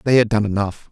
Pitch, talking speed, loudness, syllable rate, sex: 105 Hz, 265 wpm, -18 LUFS, 6.3 syllables/s, male